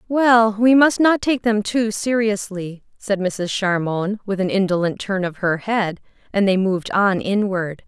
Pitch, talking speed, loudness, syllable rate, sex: 205 Hz, 175 wpm, -19 LUFS, 4.2 syllables/s, female